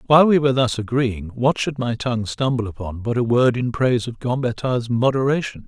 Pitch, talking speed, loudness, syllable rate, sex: 125 Hz, 200 wpm, -20 LUFS, 5.7 syllables/s, male